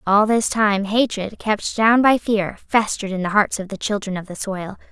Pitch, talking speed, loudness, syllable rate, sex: 205 Hz, 220 wpm, -19 LUFS, 4.9 syllables/s, female